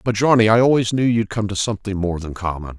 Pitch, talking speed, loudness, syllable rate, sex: 105 Hz, 260 wpm, -18 LUFS, 6.3 syllables/s, male